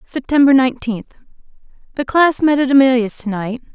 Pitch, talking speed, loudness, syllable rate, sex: 255 Hz, 130 wpm, -15 LUFS, 5.5 syllables/s, female